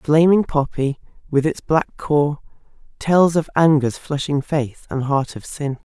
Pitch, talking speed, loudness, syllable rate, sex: 145 Hz, 160 wpm, -19 LUFS, 4.2 syllables/s, female